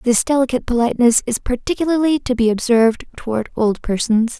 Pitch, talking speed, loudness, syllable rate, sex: 245 Hz, 150 wpm, -17 LUFS, 6.1 syllables/s, female